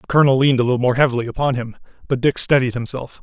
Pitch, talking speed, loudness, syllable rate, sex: 130 Hz, 240 wpm, -18 LUFS, 8.0 syllables/s, male